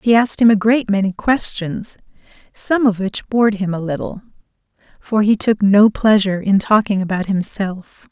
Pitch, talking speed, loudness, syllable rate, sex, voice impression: 205 Hz, 170 wpm, -16 LUFS, 4.9 syllables/s, female, very feminine, very adult-like, middle-aged, slightly thin, slightly tensed, slightly powerful, slightly bright, hard, clear, fluent, slightly cool, intellectual, refreshing, sincere, calm, slightly friendly, reassuring, unique, elegant, slightly wild, slightly sweet, slightly lively, kind, slightly sharp, slightly modest